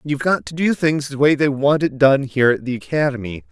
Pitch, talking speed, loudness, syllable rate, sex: 135 Hz, 255 wpm, -18 LUFS, 5.9 syllables/s, male